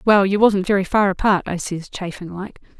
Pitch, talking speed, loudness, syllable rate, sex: 190 Hz, 215 wpm, -19 LUFS, 5.3 syllables/s, female